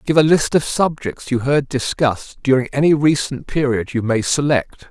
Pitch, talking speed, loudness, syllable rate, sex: 135 Hz, 185 wpm, -18 LUFS, 4.9 syllables/s, male